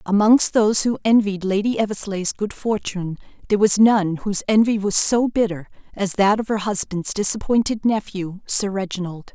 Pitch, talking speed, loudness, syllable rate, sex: 205 Hz, 160 wpm, -19 LUFS, 5.1 syllables/s, female